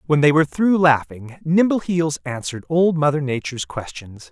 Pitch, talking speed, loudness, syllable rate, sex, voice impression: 145 Hz, 155 wpm, -19 LUFS, 5.2 syllables/s, male, masculine, adult-like, cool, slightly refreshing, sincere, slightly kind